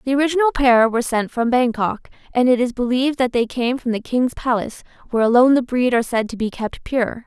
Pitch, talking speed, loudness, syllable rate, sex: 245 Hz, 230 wpm, -18 LUFS, 6.2 syllables/s, female